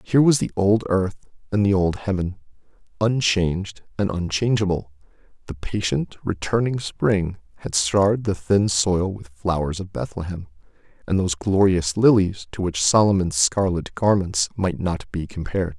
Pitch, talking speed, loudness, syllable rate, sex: 95 Hz, 145 wpm, -21 LUFS, 4.7 syllables/s, male